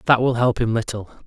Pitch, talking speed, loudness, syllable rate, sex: 120 Hz, 240 wpm, -20 LUFS, 5.9 syllables/s, male